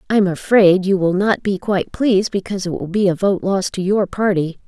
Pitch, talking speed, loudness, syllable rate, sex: 190 Hz, 245 wpm, -17 LUFS, 5.7 syllables/s, female